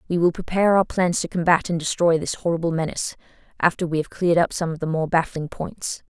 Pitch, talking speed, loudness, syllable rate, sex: 170 Hz, 225 wpm, -22 LUFS, 6.2 syllables/s, female